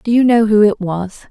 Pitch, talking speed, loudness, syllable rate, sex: 215 Hz, 275 wpm, -13 LUFS, 5.0 syllables/s, female